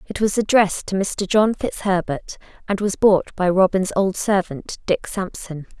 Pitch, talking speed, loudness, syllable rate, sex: 195 Hz, 165 wpm, -20 LUFS, 4.5 syllables/s, female